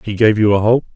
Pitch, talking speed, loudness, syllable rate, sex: 110 Hz, 315 wpm, -14 LUFS, 6.4 syllables/s, male